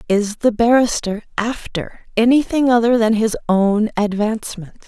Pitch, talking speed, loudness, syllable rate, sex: 220 Hz, 125 wpm, -17 LUFS, 4.6 syllables/s, female